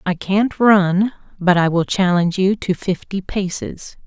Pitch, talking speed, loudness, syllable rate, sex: 190 Hz, 160 wpm, -17 LUFS, 4.2 syllables/s, female